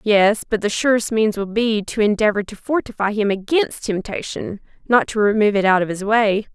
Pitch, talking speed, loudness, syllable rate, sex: 215 Hz, 200 wpm, -19 LUFS, 5.3 syllables/s, female